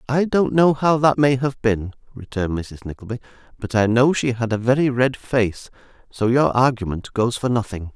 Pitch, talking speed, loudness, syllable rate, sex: 120 Hz, 195 wpm, -19 LUFS, 5.0 syllables/s, male